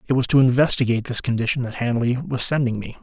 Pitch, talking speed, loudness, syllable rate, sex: 125 Hz, 220 wpm, -20 LUFS, 6.5 syllables/s, male